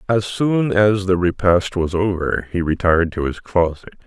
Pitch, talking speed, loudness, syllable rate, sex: 90 Hz, 175 wpm, -18 LUFS, 4.6 syllables/s, male